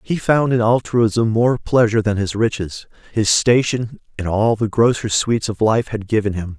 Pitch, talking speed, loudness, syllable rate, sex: 110 Hz, 190 wpm, -18 LUFS, 4.6 syllables/s, male